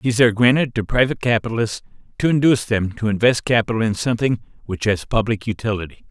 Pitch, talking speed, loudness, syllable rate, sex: 115 Hz, 175 wpm, -19 LUFS, 6.8 syllables/s, male